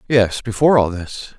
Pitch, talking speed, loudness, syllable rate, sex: 115 Hz, 175 wpm, -17 LUFS, 5.0 syllables/s, male